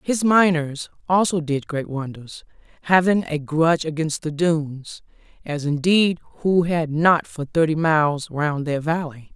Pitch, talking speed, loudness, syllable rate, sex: 160 Hz, 145 wpm, -20 LUFS, 4.3 syllables/s, female